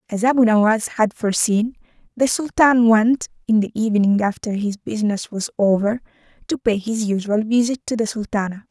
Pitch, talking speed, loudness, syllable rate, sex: 220 Hz, 165 wpm, -19 LUFS, 5.3 syllables/s, female